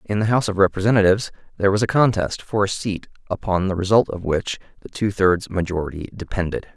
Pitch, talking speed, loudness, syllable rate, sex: 100 Hz, 195 wpm, -21 LUFS, 6.3 syllables/s, male